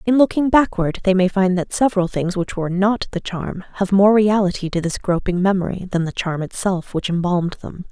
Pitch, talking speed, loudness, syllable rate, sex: 190 Hz, 210 wpm, -19 LUFS, 5.5 syllables/s, female